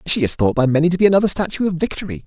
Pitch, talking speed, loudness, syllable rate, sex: 165 Hz, 290 wpm, -17 LUFS, 8.0 syllables/s, male